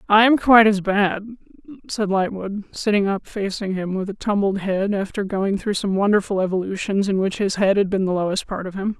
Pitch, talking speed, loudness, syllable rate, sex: 200 Hz, 215 wpm, -20 LUFS, 5.5 syllables/s, female